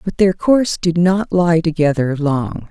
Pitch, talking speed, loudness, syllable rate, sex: 175 Hz, 180 wpm, -16 LUFS, 4.3 syllables/s, female